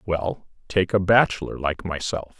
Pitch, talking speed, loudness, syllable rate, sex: 90 Hz, 125 wpm, -23 LUFS, 4.4 syllables/s, male